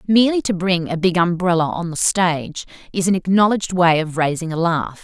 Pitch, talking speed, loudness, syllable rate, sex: 175 Hz, 205 wpm, -18 LUFS, 5.7 syllables/s, female